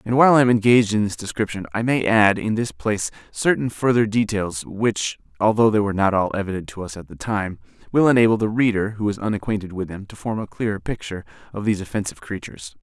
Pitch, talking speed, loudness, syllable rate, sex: 105 Hz, 220 wpm, -21 LUFS, 6.5 syllables/s, male